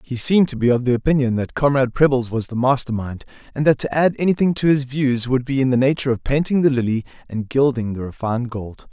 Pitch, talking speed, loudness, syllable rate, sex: 130 Hz, 240 wpm, -19 LUFS, 6.2 syllables/s, male